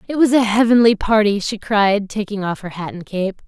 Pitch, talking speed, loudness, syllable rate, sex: 210 Hz, 225 wpm, -17 LUFS, 5.2 syllables/s, female